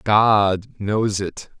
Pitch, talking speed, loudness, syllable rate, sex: 105 Hz, 115 wpm, -19 LUFS, 2.0 syllables/s, male